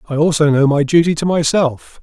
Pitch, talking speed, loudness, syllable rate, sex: 155 Hz, 205 wpm, -14 LUFS, 5.2 syllables/s, male